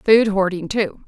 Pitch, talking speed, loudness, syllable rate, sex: 195 Hz, 170 wpm, -19 LUFS, 3.9 syllables/s, female